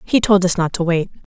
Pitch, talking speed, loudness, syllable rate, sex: 180 Hz, 275 wpm, -17 LUFS, 5.8 syllables/s, female